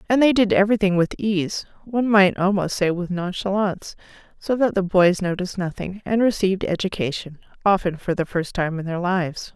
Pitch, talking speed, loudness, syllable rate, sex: 190 Hz, 175 wpm, -21 LUFS, 5.6 syllables/s, female